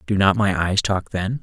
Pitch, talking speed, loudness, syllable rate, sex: 100 Hz, 255 wpm, -20 LUFS, 4.7 syllables/s, male